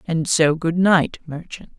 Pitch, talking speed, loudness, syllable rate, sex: 165 Hz, 170 wpm, -18 LUFS, 3.8 syllables/s, female